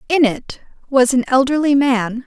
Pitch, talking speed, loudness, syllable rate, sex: 260 Hz, 160 wpm, -16 LUFS, 4.5 syllables/s, female